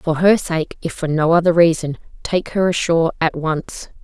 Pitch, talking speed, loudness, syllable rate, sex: 165 Hz, 195 wpm, -17 LUFS, 4.8 syllables/s, female